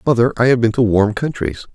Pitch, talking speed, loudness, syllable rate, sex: 115 Hz, 240 wpm, -16 LUFS, 6.0 syllables/s, male